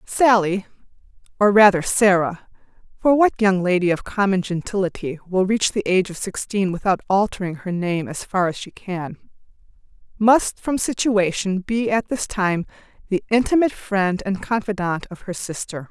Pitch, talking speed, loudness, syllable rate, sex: 195 Hz, 155 wpm, -20 LUFS, 2.9 syllables/s, female